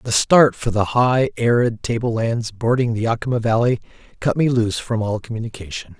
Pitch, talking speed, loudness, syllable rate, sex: 115 Hz, 180 wpm, -19 LUFS, 5.6 syllables/s, male